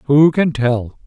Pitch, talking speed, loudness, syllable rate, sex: 135 Hz, 170 wpm, -15 LUFS, 3.1 syllables/s, male